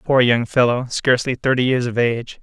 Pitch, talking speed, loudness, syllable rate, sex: 125 Hz, 175 wpm, -18 LUFS, 5.7 syllables/s, male